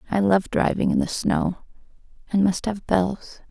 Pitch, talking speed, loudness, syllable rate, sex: 195 Hz, 170 wpm, -22 LUFS, 4.4 syllables/s, female